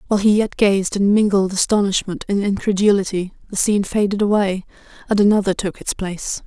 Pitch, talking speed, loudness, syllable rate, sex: 200 Hz, 165 wpm, -18 LUFS, 5.9 syllables/s, female